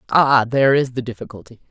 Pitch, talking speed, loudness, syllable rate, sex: 125 Hz, 175 wpm, -16 LUFS, 6.3 syllables/s, female